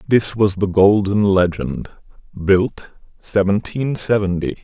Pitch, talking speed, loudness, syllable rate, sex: 100 Hz, 105 wpm, -17 LUFS, 3.8 syllables/s, male